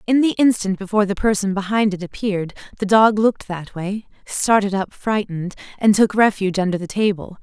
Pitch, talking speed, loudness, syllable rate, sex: 200 Hz, 170 wpm, -19 LUFS, 5.8 syllables/s, female